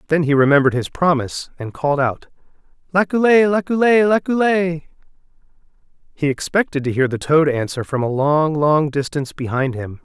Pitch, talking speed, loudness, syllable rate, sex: 155 Hz, 150 wpm, -17 LUFS, 5.5 syllables/s, male